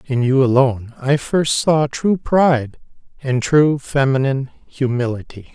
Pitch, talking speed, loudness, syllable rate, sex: 135 Hz, 130 wpm, -17 LUFS, 4.4 syllables/s, male